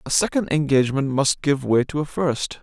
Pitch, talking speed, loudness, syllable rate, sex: 145 Hz, 205 wpm, -21 LUFS, 5.2 syllables/s, male